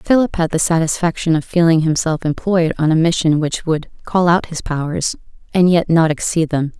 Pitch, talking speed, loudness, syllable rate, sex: 165 Hz, 195 wpm, -16 LUFS, 5.3 syllables/s, female